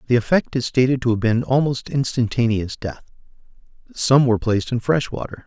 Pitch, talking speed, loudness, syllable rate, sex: 120 Hz, 175 wpm, -20 LUFS, 5.7 syllables/s, male